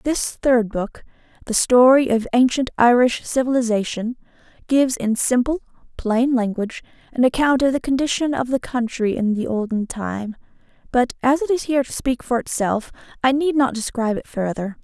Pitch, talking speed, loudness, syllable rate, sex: 245 Hz, 160 wpm, -20 LUFS, 5.2 syllables/s, female